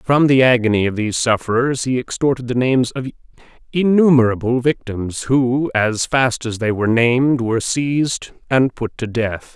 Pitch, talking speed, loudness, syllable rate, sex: 125 Hz, 165 wpm, -17 LUFS, 5.0 syllables/s, male